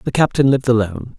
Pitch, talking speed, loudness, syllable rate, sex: 125 Hz, 205 wpm, -16 LUFS, 7.5 syllables/s, male